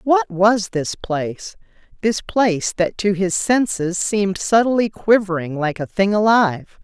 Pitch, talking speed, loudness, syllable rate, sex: 195 Hz, 140 wpm, -18 LUFS, 4.2 syllables/s, female